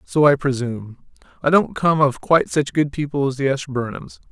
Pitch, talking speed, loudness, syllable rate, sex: 140 Hz, 195 wpm, -19 LUFS, 5.4 syllables/s, male